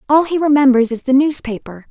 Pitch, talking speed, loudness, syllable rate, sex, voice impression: 270 Hz, 190 wpm, -14 LUFS, 5.9 syllables/s, female, very feminine, young, very thin, tensed, slightly powerful, very bright, hard, very clear, very fluent, very cute, intellectual, very refreshing, sincere, slightly calm, very friendly, very reassuring, slightly unique, very elegant, very sweet, very lively, kind, slightly intense, slightly modest